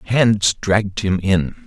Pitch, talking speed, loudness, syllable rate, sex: 100 Hz, 145 wpm, -17 LUFS, 3.5 syllables/s, male